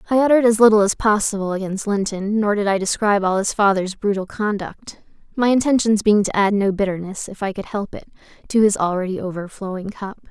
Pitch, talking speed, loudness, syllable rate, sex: 205 Hz, 200 wpm, -19 LUFS, 6.0 syllables/s, female